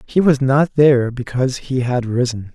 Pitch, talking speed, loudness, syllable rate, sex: 130 Hz, 190 wpm, -17 LUFS, 5.1 syllables/s, male